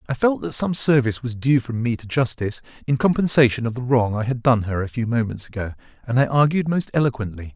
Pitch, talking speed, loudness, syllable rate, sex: 125 Hz, 230 wpm, -21 LUFS, 6.2 syllables/s, male